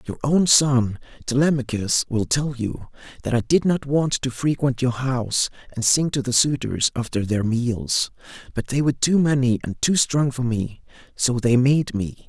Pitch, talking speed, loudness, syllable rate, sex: 125 Hz, 185 wpm, -21 LUFS, 4.5 syllables/s, male